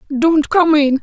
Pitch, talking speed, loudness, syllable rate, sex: 305 Hz, 175 wpm, -13 LUFS, 3.8 syllables/s, female